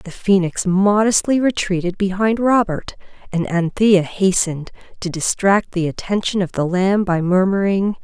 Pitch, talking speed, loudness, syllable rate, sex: 190 Hz, 135 wpm, -17 LUFS, 4.5 syllables/s, female